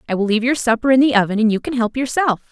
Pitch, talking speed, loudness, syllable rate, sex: 240 Hz, 310 wpm, -17 LUFS, 7.5 syllables/s, female